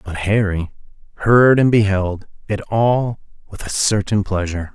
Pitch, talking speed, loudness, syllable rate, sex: 105 Hz, 140 wpm, -17 LUFS, 4.5 syllables/s, male